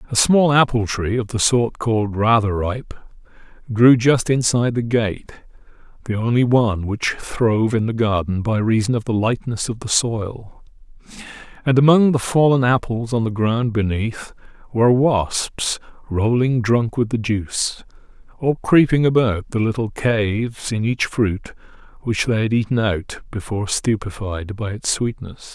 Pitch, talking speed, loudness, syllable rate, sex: 115 Hz, 155 wpm, -19 LUFS, 4.6 syllables/s, male